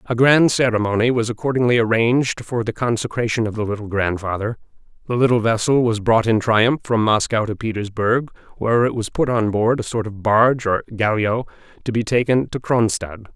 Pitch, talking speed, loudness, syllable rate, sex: 115 Hz, 185 wpm, -19 LUFS, 5.5 syllables/s, male